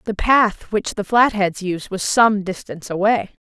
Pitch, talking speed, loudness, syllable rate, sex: 205 Hz, 175 wpm, -18 LUFS, 4.3 syllables/s, female